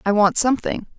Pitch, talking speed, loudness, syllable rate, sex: 215 Hz, 185 wpm, -19 LUFS, 6.3 syllables/s, female